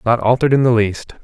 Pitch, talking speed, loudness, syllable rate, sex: 120 Hz, 245 wpm, -15 LUFS, 6.5 syllables/s, male